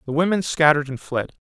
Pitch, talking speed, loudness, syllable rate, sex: 145 Hz, 205 wpm, -20 LUFS, 6.5 syllables/s, male